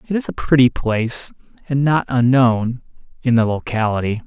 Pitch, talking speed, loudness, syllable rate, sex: 125 Hz, 140 wpm, -18 LUFS, 5.1 syllables/s, male